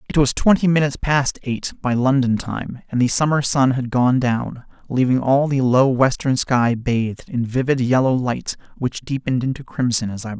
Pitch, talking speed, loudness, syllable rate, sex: 130 Hz, 200 wpm, -19 LUFS, 5.2 syllables/s, male